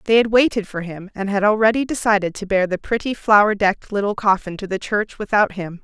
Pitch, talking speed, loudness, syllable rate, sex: 205 Hz, 225 wpm, -19 LUFS, 5.9 syllables/s, female